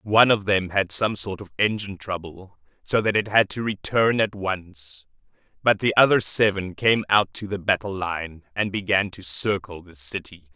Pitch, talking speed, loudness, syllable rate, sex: 95 Hz, 190 wpm, -22 LUFS, 4.7 syllables/s, male